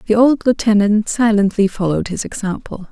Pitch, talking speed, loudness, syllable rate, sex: 210 Hz, 145 wpm, -16 LUFS, 5.5 syllables/s, female